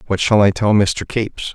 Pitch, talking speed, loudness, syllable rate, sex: 100 Hz, 235 wpm, -16 LUFS, 5.3 syllables/s, male